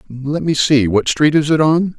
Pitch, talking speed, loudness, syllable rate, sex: 145 Hz, 240 wpm, -14 LUFS, 4.5 syllables/s, male